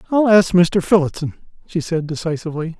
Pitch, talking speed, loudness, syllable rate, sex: 170 Hz, 150 wpm, -17 LUFS, 5.5 syllables/s, male